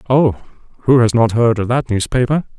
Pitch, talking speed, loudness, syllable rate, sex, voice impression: 120 Hz, 160 wpm, -15 LUFS, 4.4 syllables/s, male, masculine, middle-aged, tensed, slightly dark, hard, clear, fluent, intellectual, calm, wild, slightly kind, slightly modest